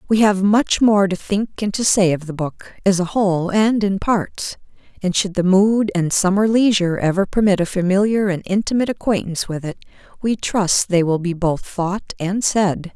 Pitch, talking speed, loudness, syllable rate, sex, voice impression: 195 Hz, 200 wpm, -18 LUFS, 4.9 syllables/s, female, very feminine, slightly middle-aged, slightly thin, slightly tensed, powerful, slightly bright, hard, clear, very fluent, slightly raspy, cool, intellectual, refreshing, sincere, slightly calm, friendly, very reassuring, unique, slightly elegant, slightly wild, sweet, slightly lively, strict, slightly intense, slightly sharp